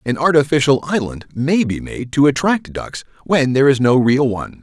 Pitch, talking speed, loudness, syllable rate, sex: 135 Hz, 195 wpm, -16 LUFS, 5.2 syllables/s, male